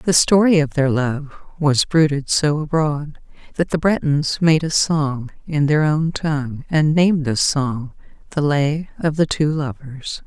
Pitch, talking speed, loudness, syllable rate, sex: 150 Hz, 170 wpm, -18 LUFS, 4.0 syllables/s, female